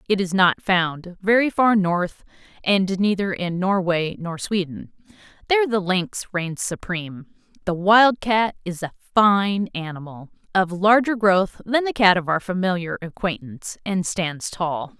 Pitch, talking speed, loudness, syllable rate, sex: 190 Hz, 150 wpm, -21 LUFS, 4.2 syllables/s, female